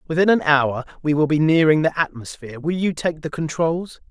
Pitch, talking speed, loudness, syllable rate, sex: 155 Hz, 205 wpm, -20 LUFS, 5.5 syllables/s, male